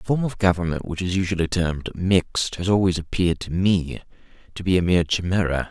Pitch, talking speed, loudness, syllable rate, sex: 90 Hz, 200 wpm, -22 LUFS, 6.1 syllables/s, male